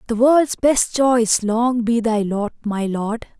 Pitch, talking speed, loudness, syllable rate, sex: 230 Hz, 175 wpm, -18 LUFS, 3.3 syllables/s, female